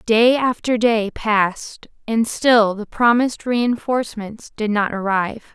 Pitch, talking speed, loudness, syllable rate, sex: 225 Hz, 140 wpm, -18 LUFS, 4.2 syllables/s, female